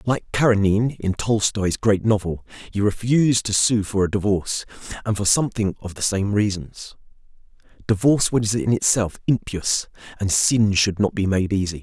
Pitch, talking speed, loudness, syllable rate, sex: 105 Hz, 160 wpm, -21 LUFS, 5.1 syllables/s, male